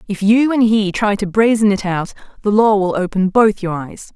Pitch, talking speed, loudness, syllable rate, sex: 205 Hz, 230 wpm, -15 LUFS, 4.9 syllables/s, female